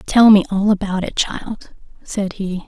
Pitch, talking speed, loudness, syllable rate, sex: 200 Hz, 180 wpm, -17 LUFS, 4.1 syllables/s, female